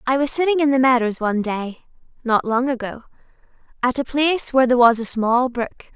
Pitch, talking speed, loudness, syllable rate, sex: 250 Hz, 200 wpm, -19 LUFS, 6.1 syllables/s, female